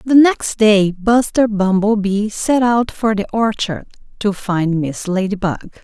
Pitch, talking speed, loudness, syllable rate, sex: 210 Hz, 145 wpm, -16 LUFS, 3.8 syllables/s, female